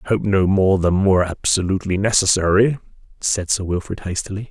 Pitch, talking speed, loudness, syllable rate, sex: 95 Hz, 160 wpm, -18 LUFS, 5.8 syllables/s, male